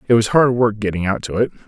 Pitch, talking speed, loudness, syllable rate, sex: 110 Hz, 285 wpm, -17 LUFS, 6.6 syllables/s, male